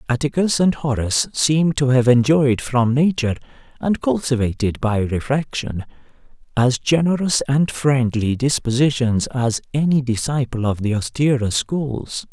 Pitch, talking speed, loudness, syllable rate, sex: 130 Hz, 120 wpm, -19 LUFS, 4.4 syllables/s, male